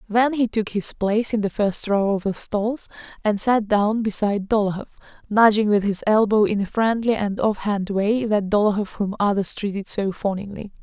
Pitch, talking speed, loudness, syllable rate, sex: 210 Hz, 190 wpm, -21 LUFS, 5.1 syllables/s, female